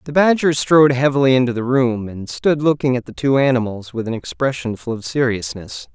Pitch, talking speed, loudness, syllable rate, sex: 125 Hz, 200 wpm, -17 LUFS, 5.5 syllables/s, male